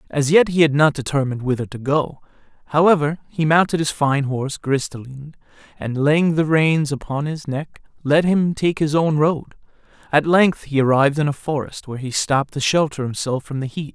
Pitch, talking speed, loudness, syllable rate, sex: 145 Hz, 200 wpm, -19 LUFS, 5.3 syllables/s, male